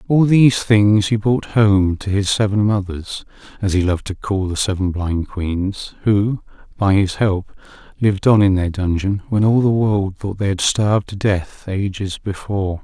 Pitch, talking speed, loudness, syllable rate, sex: 100 Hz, 185 wpm, -18 LUFS, 4.5 syllables/s, male